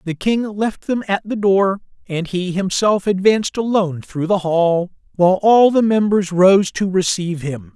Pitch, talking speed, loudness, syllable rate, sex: 190 Hz, 180 wpm, -17 LUFS, 4.6 syllables/s, male